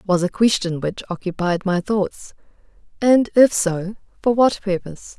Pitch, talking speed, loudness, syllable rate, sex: 195 Hz, 150 wpm, -19 LUFS, 4.5 syllables/s, female